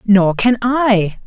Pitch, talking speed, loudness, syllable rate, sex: 215 Hz, 140 wpm, -14 LUFS, 2.9 syllables/s, female